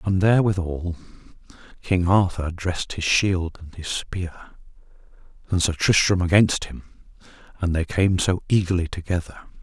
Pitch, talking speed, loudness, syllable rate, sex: 90 Hz, 135 wpm, -22 LUFS, 4.8 syllables/s, male